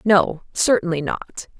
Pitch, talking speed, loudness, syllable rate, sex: 180 Hz, 115 wpm, -20 LUFS, 3.8 syllables/s, female